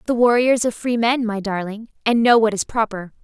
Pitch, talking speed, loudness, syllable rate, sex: 225 Hz, 225 wpm, -19 LUFS, 5.6 syllables/s, female